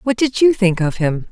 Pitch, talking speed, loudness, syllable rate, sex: 210 Hz, 275 wpm, -16 LUFS, 5.0 syllables/s, female